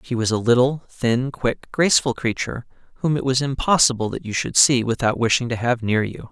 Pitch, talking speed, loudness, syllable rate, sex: 125 Hz, 210 wpm, -20 LUFS, 5.5 syllables/s, male